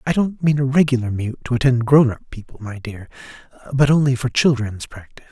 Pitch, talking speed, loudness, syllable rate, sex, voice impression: 125 Hz, 205 wpm, -18 LUFS, 5.8 syllables/s, male, very masculine, very adult-like, very middle-aged, very thick, slightly tensed, powerful, slightly dark, hard, slightly muffled, slightly fluent, slightly raspy, cool, very intellectual, sincere, very calm, very mature, friendly, very reassuring, slightly unique, elegant, slightly wild, slightly sweet, very kind, slightly strict, slightly modest